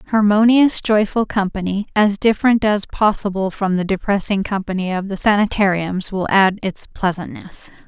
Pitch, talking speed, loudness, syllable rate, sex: 200 Hz, 135 wpm, -17 LUFS, 4.8 syllables/s, female